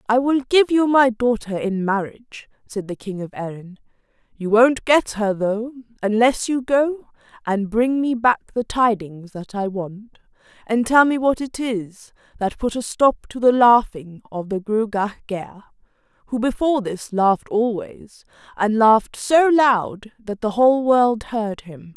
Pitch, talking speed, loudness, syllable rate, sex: 225 Hz, 170 wpm, -19 LUFS, 4.2 syllables/s, female